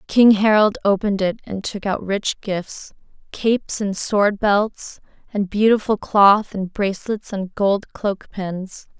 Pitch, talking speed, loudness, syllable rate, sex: 200 Hz, 140 wpm, -19 LUFS, 3.8 syllables/s, female